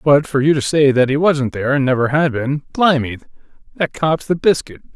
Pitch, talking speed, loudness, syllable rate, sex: 140 Hz, 205 wpm, -16 LUFS, 5.4 syllables/s, male